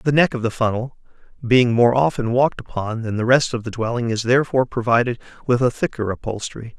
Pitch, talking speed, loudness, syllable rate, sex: 120 Hz, 205 wpm, -20 LUFS, 6.2 syllables/s, male